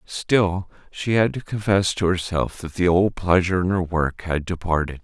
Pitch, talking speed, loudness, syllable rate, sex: 90 Hz, 190 wpm, -22 LUFS, 4.7 syllables/s, male